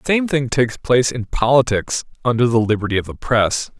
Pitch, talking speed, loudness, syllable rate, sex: 120 Hz, 205 wpm, -18 LUFS, 5.9 syllables/s, male